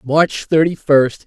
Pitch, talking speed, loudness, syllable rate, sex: 150 Hz, 140 wpm, -15 LUFS, 3.4 syllables/s, male